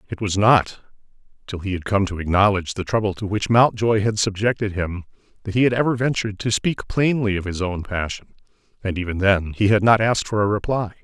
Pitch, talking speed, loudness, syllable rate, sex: 105 Hz, 210 wpm, -20 LUFS, 5.9 syllables/s, male